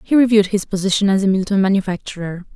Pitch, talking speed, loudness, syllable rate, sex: 195 Hz, 190 wpm, -17 LUFS, 7.1 syllables/s, female